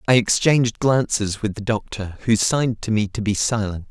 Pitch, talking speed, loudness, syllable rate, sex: 110 Hz, 200 wpm, -20 LUFS, 5.3 syllables/s, male